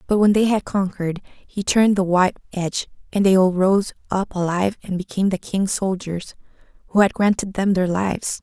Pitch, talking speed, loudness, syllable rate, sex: 190 Hz, 190 wpm, -20 LUFS, 5.6 syllables/s, female